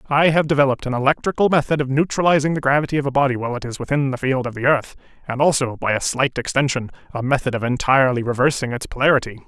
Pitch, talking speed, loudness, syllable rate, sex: 135 Hz, 220 wpm, -19 LUFS, 7.2 syllables/s, male